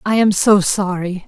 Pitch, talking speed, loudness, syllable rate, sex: 195 Hz, 190 wpm, -15 LUFS, 4.3 syllables/s, female